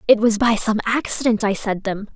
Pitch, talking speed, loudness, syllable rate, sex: 215 Hz, 225 wpm, -18 LUFS, 5.2 syllables/s, female